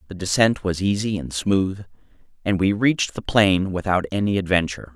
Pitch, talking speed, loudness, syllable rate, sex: 95 Hz, 170 wpm, -21 LUFS, 5.4 syllables/s, male